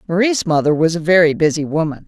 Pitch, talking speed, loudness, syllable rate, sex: 165 Hz, 205 wpm, -15 LUFS, 6.4 syllables/s, female